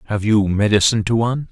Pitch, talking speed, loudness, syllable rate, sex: 105 Hz, 160 wpm, -17 LUFS, 6.1 syllables/s, male